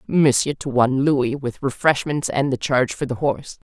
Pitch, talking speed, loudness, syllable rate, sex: 135 Hz, 195 wpm, -20 LUFS, 5.2 syllables/s, female